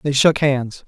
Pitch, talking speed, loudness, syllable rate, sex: 135 Hz, 205 wpm, -17 LUFS, 3.9 syllables/s, male